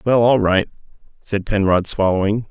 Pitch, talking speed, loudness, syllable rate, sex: 105 Hz, 145 wpm, -17 LUFS, 4.9 syllables/s, male